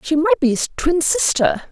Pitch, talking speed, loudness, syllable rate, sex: 320 Hz, 210 wpm, -17 LUFS, 4.6 syllables/s, female